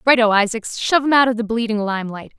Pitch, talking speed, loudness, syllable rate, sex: 225 Hz, 225 wpm, -17 LUFS, 6.7 syllables/s, female